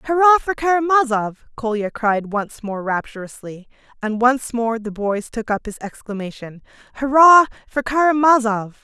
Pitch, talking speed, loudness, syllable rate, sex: 240 Hz, 135 wpm, -18 LUFS, 4.7 syllables/s, female